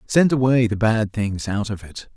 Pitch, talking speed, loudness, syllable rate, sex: 110 Hz, 220 wpm, -20 LUFS, 4.5 syllables/s, male